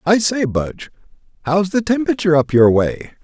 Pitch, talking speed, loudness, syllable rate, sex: 175 Hz, 165 wpm, -16 LUFS, 5.7 syllables/s, male